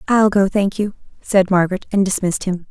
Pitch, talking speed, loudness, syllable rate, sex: 195 Hz, 200 wpm, -17 LUFS, 5.8 syllables/s, female